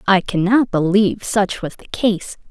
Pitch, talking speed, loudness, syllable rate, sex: 195 Hz, 170 wpm, -18 LUFS, 4.5 syllables/s, female